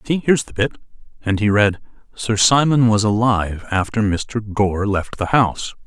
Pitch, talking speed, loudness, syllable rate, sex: 110 Hz, 175 wpm, -18 LUFS, 4.9 syllables/s, male